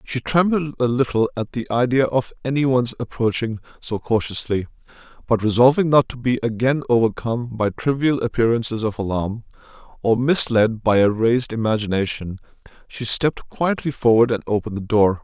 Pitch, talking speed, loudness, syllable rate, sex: 120 Hz, 150 wpm, -20 LUFS, 5.3 syllables/s, male